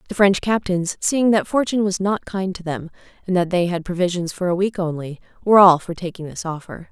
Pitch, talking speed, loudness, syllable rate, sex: 185 Hz, 225 wpm, -20 LUFS, 5.8 syllables/s, female